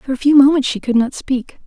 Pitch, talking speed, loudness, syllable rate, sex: 260 Hz, 290 wpm, -15 LUFS, 5.7 syllables/s, female